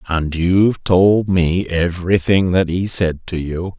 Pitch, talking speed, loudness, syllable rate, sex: 90 Hz, 160 wpm, -16 LUFS, 3.9 syllables/s, male